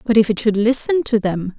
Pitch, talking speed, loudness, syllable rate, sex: 225 Hz, 265 wpm, -17 LUFS, 5.4 syllables/s, female